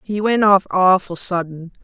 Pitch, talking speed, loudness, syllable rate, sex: 190 Hz, 165 wpm, -16 LUFS, 4.4 syllables/s, female